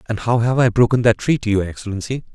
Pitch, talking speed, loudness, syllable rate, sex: 115 Hz, 230 wpm, -18 LUFS, 6.7 syllables/s, male